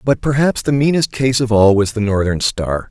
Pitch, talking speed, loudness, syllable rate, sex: 120 Hz, 225 wpm, -15 LUFS, 5.0 syllables/s, male